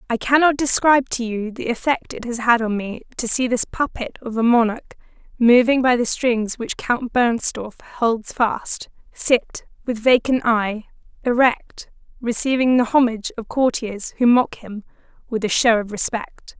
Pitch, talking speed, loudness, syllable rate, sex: 235 Hz, 165 wpm, -19 LUFS, 4.3 syllables/s, female